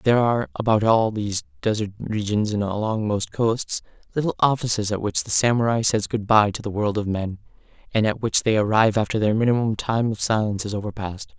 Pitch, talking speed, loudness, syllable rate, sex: 110 Hz, 200 wpm, -22 LUFS, 5.8 syllables/s, male